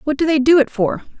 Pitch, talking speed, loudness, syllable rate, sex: 280 Hz, 300 wpm, -16 LUFS, 6.2 syllables/s, female